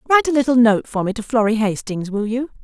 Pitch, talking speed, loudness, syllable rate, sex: 230 Hz, 250 wpm, -18 LUFS, 6.4 syllables/s, female